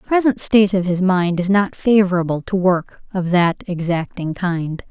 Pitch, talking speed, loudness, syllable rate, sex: 185 Hz, 185 wpm, -18 LUFS, 4.7 syllables/s, female